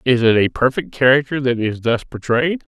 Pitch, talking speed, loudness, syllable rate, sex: 130 Hz, 195 wpm, -17 LUFS, 5.1 syllables/s, male